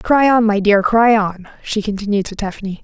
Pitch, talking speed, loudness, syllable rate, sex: 210 Hz, 210 wpm, -15 LUFS, 5.3 syllables/s, female